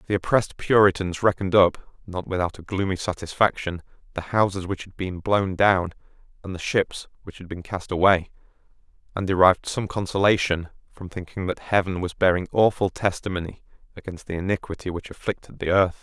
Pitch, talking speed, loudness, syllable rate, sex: 95 Hz, 165 wpm, -23 LUFS, 5.5 syllables/s, male